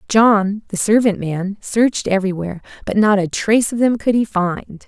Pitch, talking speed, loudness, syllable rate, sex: 205 Hz, 185 wpm, -17 LUFS, 5.0 syllables/s, female